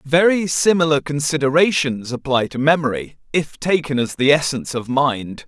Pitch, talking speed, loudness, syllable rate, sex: 145 Hz, 140 wpm, -18 LUFS, 5.0 syllables/s, male